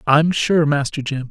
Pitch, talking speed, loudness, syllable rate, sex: 145 Hz, 185 wpm, -18 LUFS, 4.3 syllables/s, male